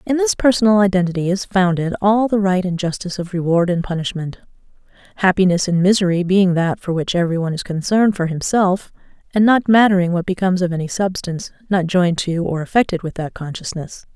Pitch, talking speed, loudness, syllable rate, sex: 185 Hz, 185 wpm, -17 LUFS, 6.1 syllables/s, female